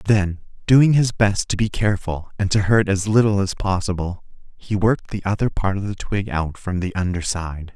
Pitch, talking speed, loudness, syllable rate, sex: 100 Hz, 210 wpm, -20 LUFS, 5.0 syllables/s, male